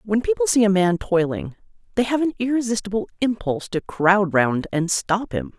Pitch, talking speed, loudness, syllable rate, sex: 205 Hz, 185 wpm, -21 LUFS, 5.2 syllables/s, female